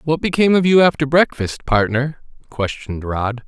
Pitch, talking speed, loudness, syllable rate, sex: 140 Hz, 155 wpm, -17 LUFS, 5.2 syllables/s, male